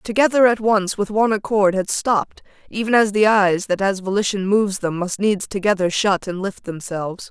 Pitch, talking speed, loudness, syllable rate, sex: 200 Hz, 195 wpm, -19 LUFS, 2.3 syllables/s, female